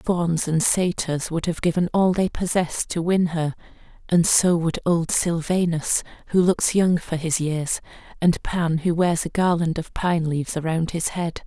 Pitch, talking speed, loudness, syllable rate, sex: 170 Hz, 190 wpm, -22 LUFS, 4.5 syllables/s, female